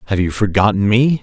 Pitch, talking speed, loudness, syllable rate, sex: 105 Hz, 195 wpm, -15 LUFS, 5.9 syllables/s, male